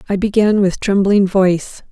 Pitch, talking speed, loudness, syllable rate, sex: 195 Hz, 155 wpm, -15 LUFS, 4.8 syllables/s, female